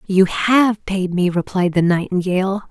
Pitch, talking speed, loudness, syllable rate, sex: 190 Hz, 155 wpm, -17 LUFS, 4.4 syllables/s, female